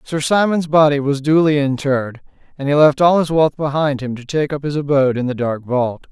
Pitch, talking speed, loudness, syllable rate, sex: 145 Hz, 225 wpm, -16 LUFS, 5.5 syllables/s, male